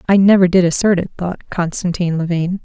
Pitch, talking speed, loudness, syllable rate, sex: 180 Hz, 180 wpm, -15 LUFS, 5.4 syllables/s, female